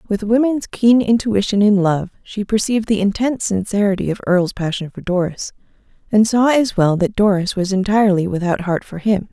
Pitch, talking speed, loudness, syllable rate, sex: 200 Hz, 180 wpm, -17 LUFS, 5.5 syllables/s, female